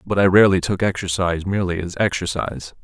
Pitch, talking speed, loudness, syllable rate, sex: 90 Hz, 170 wpm, -19 LUFS, 6.8 syllables/s, male